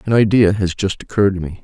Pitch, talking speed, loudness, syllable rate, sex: 100 Hz, 255 wpm, -16 LUFS, 6.6 syllables/s, male